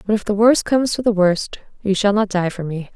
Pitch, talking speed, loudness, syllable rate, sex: 200 Hz, 285 wpm, -18 LUFS, 5.8 syllables/s, female